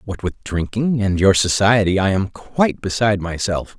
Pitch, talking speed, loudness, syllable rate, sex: 100 Hz, 175 wpm, -18 LUFS, 4.9 syllables/s, male